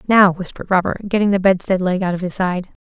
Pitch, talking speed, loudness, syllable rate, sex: 185 Hz, 230 wpm, -18 LUFS, 6.2 syllables/s, female